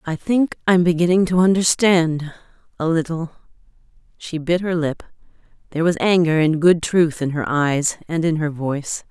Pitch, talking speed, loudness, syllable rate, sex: 165 Hz, 160 wpm, -19 LUFS, 4.9 syllables/s, female